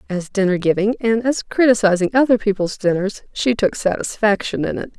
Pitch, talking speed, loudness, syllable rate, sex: 210 Hz, 170 wpm, -18 LUFS, 5.4 syllables/s, female